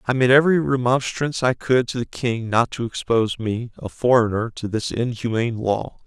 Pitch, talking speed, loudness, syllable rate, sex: 120 Hz, 190 wpm, -21 LUFS, 5.2 syllables/s, male